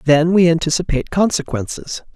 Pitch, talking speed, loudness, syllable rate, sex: 165 Hz, 110 wpm, -17 LUFS, 5.7 syllables/s, male